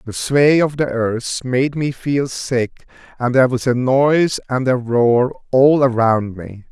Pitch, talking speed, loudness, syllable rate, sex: 130 Hz, 180 wpm, -16 LUFS, 4.0 syllables/s, male